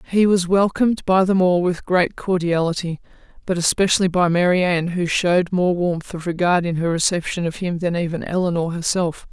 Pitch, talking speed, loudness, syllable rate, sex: 175 Hz, 180 wpm, -19 LUFS, 5.3 syllables/s, female